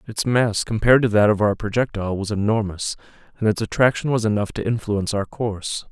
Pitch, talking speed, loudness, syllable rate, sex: 110 Hz, 195 wpm, -21 LUFS, 6.1 syllables/s, male